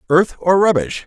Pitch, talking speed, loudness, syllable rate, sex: 160 Hz, 170 wpm, -15 LUFS, 4.8 syllables/s, male